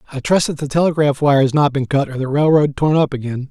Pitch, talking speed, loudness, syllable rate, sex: 145 Hz, 275 wpm, -16 LUFS, 6.2 syllables/s, male